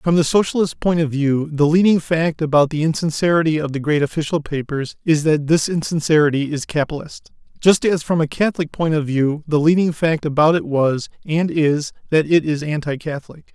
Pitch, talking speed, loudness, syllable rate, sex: 155 Hz, 195 wpm, -18 LUFS, 5.4 syllables/s, male